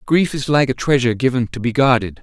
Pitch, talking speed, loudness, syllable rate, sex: 130 Hz, 245 wpm, -17 LUFS, 6.2 syllables/s, male